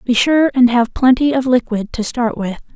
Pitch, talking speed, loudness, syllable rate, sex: 245 Hz, 220 wpm, -15 LUFS, 4.8 syllables/s, female